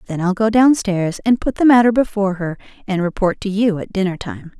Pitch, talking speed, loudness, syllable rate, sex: 205 Hz, 235 wpm, -17 LUFS, 5.7 syllables/s, female